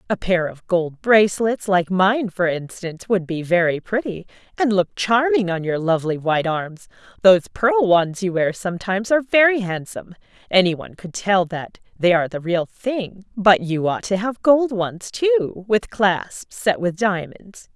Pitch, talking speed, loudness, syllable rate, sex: 195 Hz, 170 wpm, -19 LUFS, 4.6 syllables/s, female